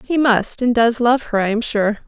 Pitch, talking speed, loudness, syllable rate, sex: 230 Hz, 260 wpm, -17 LUFS, 4.8 syllables/s, female